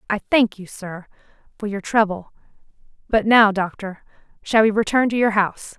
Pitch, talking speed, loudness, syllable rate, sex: 210 Hz, 155 wpm, -19 LUFS, 5.1 syllables/s, female